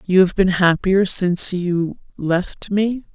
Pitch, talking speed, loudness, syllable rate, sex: 185 Hz, 135 wpm, -18 LUFS, 3.6 syllables/s, female